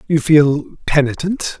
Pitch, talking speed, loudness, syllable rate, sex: 150 Hz, 115 wpm, -15 LUFS, 3.7 syllables/s, male